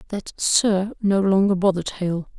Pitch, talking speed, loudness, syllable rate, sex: 195 Hz, 150 wpm, -20 LUFS, 4.4 syllables/s, female